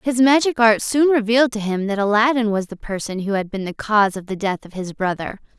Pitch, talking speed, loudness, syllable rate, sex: 215 Hz, 245 wpm, -19 LUFS, 5.8 syllables/s, female